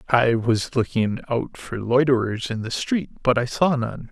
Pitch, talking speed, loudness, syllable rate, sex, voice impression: 125 Hz, 190 wpm, -22 LUFS, 4.3 syllables/s, male, masculine, slightly old, slightly powerful, slightly hard, muffled, raspy, calm, mature, slightly friendly, kind, slightly modest